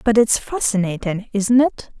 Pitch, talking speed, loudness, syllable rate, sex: 220 Hz, 150 wpm, -18 LUFS, 4.6 syllables/s, female